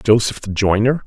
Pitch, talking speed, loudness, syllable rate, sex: 110 Hz, 170 wpm, -17 LUFS, 5.0 syllables/s, male